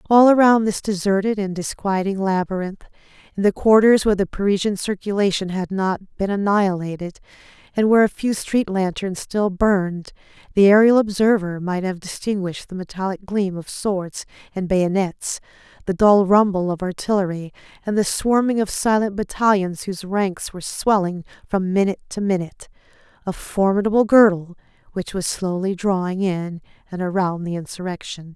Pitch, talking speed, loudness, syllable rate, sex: 195 Hz, 150 wpm, -20 LUFS, 5.2 syllables/s, female